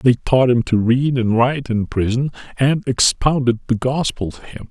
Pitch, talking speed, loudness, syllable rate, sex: 125 Hz, 190 wpm, -18 LUFS, 4.7 syllables/s, male